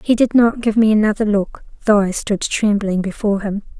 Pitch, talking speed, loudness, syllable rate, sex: 210 Hz, 205 wpm, -17 LUFS, 5.4 syllables/s, female